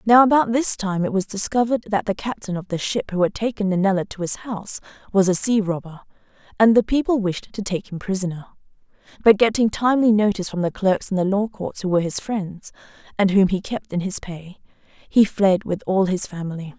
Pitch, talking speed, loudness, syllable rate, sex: 200 Hz, 215 wpm, -21 LUFS, 5.6 syllables/s, female